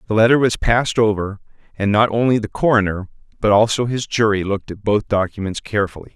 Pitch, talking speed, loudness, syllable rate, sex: 105 Hz, 185 wpm, -18 LUFS, 6.2 syllables/s, male